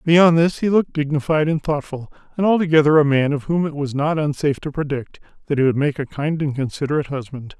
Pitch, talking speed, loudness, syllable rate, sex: 150 Hz, 220 wpm, -19 LUFS, 6.2 syllables/s, male